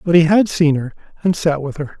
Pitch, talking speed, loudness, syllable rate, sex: 160 Hz, 270 wpm, -16 LUFS, 5.7 syllables/s, male